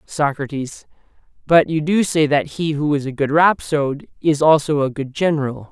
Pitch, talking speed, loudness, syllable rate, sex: 150 Hz, 180 wpm, -18 LUFS, 4.9 syllables/s, male